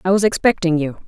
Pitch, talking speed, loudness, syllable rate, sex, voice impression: 180 Hz, 225 wpm, -17 LUFS, 6.5 syllables/s, female, feminine, slightly young, slightly adult-like, very thin, slightly relaxed, slightly weak, slightly dark, hard, clear, cute, intellectual, slightly refreshing, very sincere, very calm, friendly, reassuring, unique, elegant, slightly wild, sweet, slightly lively, kind, slightly modest